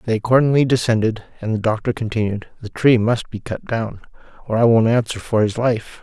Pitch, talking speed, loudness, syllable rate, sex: 115 Hz, 200 wpm, -19 LUFS, 5.6 syllables/s, male